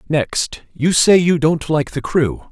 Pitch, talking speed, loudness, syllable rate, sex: 155 Hz, 190 wpm, -16 LUFS, 3.6 syllables/s, male